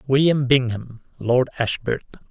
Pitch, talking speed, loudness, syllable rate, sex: 130 Hz, 105 wpm, -21 LUFS, 4.8 syllables/s, male